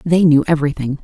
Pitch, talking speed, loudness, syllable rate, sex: 155 Hz, 175 wpm, -15 LUFS, 6.7 syllables/s, female